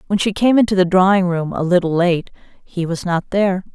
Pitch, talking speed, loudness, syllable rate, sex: 185 Hz, 225 wpm, -17 LUFS, 5.5 syllables/s, female